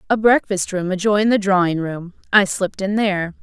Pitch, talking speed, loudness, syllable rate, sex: 195 Hz, 195 wpm, -18 LUFS, 5.7 syllables/s, female